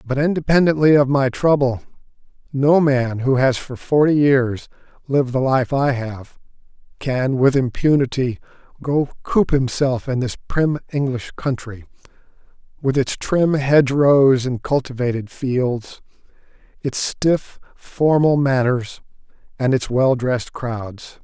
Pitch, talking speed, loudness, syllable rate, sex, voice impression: 135 Hz, 125 wpm, -18 LUFS, 4.0 syllables/s, male, masculine, middle-aged, relaxed, slightly powerful, soft, raspy, cool, calm, mature, reassuring, wild, lively, kind, modest